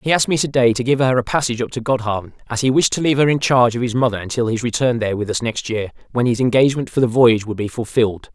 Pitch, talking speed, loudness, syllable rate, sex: 120 Hz, 295 wpm, -18 LUFS, 7.2 syllables/s, male